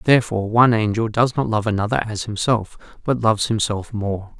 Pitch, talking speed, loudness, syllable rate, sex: 110 Hz, 175 wpm, -20 LUFS, 5.9 syllables/s, male